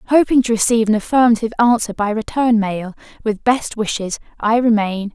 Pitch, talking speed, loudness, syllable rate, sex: 225 Hz, 165 wpm, -17 LUFS, 5.5 syllables/s, female